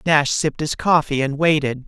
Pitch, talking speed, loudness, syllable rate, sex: 150 Hz, 190 wpm, -19 LUFS, 5.1 syllables/s, male